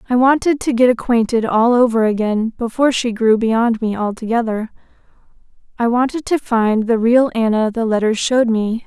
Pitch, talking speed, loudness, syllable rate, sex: 230 Hz, 160 wpm, -16 LUFS, 5.2 syllables/s, female